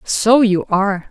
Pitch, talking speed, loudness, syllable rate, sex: 205 Hz, 165 wpm, -14 LUFS, 4.1 syllables/s, female